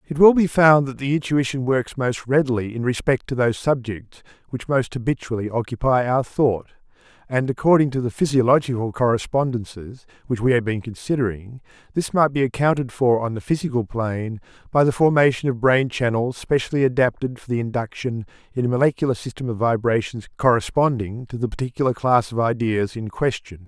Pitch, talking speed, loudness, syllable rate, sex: 125 Hz, 170 wpm, -21 LUFS, 5.6 syllables/s, male